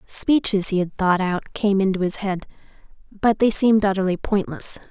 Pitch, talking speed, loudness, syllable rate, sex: 195 Hz, 170 wpm, -20 LUFS, 4.9 syllables/s, female